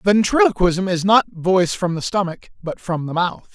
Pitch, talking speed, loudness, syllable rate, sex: 185 Hz, 185 wpm, -18 LUFS, 5.0 syllables/s, male